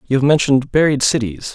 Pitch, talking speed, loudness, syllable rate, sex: 135 Hz, 195 wpm, -15 LUFS, 6.2 syllables/s, male